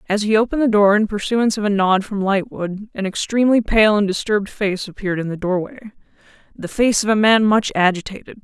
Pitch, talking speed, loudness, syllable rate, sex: 205 Hz, 200 wpm, -18 LUFS, 6.1 syllables/s, female